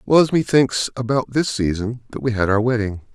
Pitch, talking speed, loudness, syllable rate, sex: 120 Hz, 210 wpm, -19 LUFS, 5.2 syllables/s, male